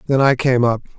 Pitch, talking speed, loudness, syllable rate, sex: 125 Hz, 245 wpm, -16 LUFS, 5.9 syllables/s, male